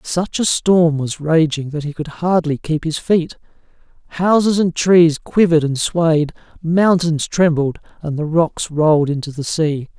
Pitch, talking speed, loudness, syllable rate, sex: 160 Hz, 160 wpm, -16 LUFS, 4.2 syllables/s, male